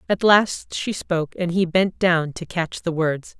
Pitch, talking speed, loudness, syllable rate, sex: 175 Hz, 210 wpm, -21 LUFS, 4.1 syllables/s, female